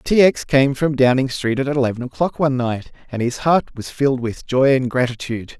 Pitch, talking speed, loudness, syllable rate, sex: 130 Hz, 215 wpm, -18 LUFS, 5.5 syllables/s, male